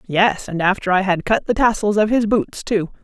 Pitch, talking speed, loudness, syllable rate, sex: 200 Hz, 235 wpm, -18 LUFS, 5.0 syllables/s, female